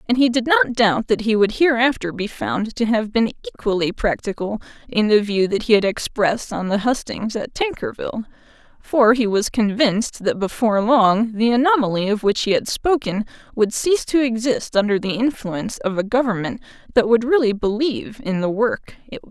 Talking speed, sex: 195 wpm, female